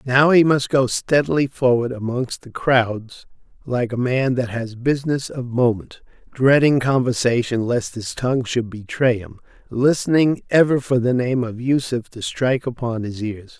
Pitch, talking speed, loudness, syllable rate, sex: 125 Hz, 165 wpm, -19 LUFS, 4.5 syllables/s, male